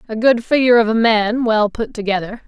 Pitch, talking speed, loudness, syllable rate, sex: 225 Hz, 220 wpm, -16 LUFS, 5.7 syllables/s, female